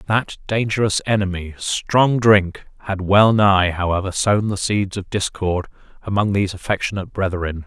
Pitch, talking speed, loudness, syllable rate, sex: 100 Hz, 140 wpm, -19 LUFS, 4.7 syllables/s, male